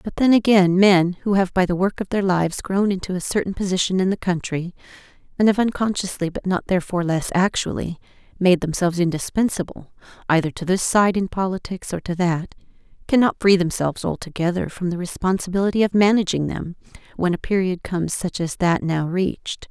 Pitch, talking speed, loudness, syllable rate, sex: 185 Hz, 180 wpm, -21 LUFS, 5.8 syllables/s, female